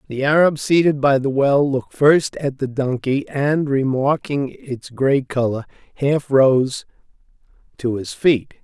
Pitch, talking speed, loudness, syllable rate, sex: 135 Hz, 145 wpm, -18 LUFS, 3.9 syllables/s, male